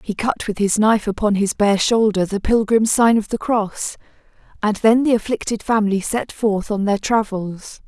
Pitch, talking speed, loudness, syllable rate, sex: 215 Hz, 190 wpm, -18 LUFS, 4.9 syllables/s, female